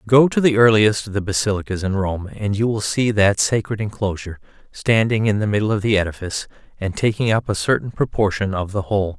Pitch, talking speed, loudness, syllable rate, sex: 105 Hz, 210 wpm, -19 LUFS, 5.9 syllables/s, male